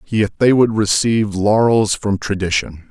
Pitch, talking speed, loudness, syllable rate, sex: 105 Hz, 145 wpm, -16 LUFS, 4.5 syllables/s, male